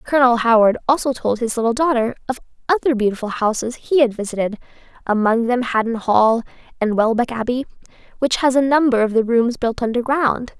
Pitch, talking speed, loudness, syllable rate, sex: 240 Hz, 175 wpm, -18 LUFS, 5.7 syllables/s, female